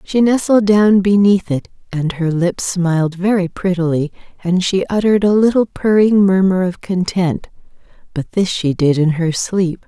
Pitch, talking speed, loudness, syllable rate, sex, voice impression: 185 Hz, 165 wpm, -15 LUFS, 4.5 syllables/s, female, feminine, very adult-like, slightly weak, soft, slightly muffled, calm, reassuring